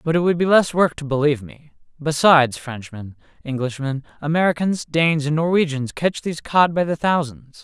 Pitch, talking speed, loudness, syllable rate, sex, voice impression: 150 Hz, 175 wpm, -19 LUFS, 5.4 syllables/s, male, very masculine, very adult-like, thick, tensed, slightly powerful, bright, slightly soft, clear, fluent, cool, intellectual, very refreshing, sincere, calm, friendly, reassuring, slightly unique, elegant, slightly wild, sweet, lively, kind